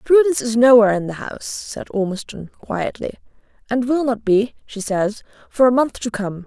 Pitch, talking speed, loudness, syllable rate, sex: 230 Hz, 185 wpm, -19 LUFS, 5.2 syllables/s, female